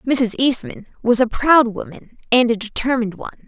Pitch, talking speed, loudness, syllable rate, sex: 235 Hz, 175 wpm, -17 LUFS, 5.3 syllables/s, female